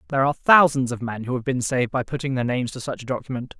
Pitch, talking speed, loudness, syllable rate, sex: 130 Hz, 285 wpm, -22 LUFS, 7.5 syllables/s, male